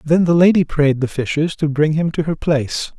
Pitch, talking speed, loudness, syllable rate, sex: 155 Hz, 240 wpm, -17 LUFS, 5.3 syllables/s, male